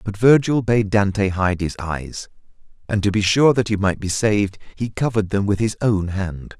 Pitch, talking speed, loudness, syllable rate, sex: 100 Hz, 210 wpm, -19 LUFS, 5.0 syllables/s, male